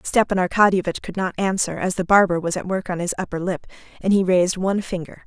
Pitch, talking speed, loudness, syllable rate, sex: 185 Hz, 230 wpm, -21 LUFS, 6.4 syllables/s, female